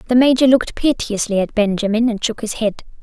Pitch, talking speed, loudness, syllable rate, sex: 225 Hz, 200 wpm, -17 LUFS, 5.6 syllables/s, female